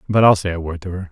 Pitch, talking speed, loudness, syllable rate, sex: 90 Hz, 380 wpm, -18 LUFS, 7.5 syllables/s, male